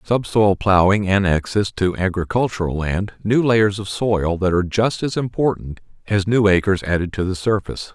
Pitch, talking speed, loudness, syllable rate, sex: 100 Hz, 165 wpm, -19 LUFS, 4.9 syllables/s, male